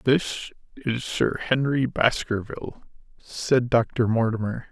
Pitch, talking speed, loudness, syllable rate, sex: 125 Hz, 100 wpm, -24 LUFS, 3.7 syllables/s, male